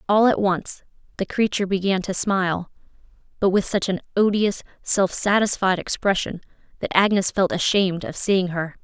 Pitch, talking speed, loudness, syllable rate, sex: 190 Hz, 155 wpm, -21 LUFS, 5.1 syllables/s, female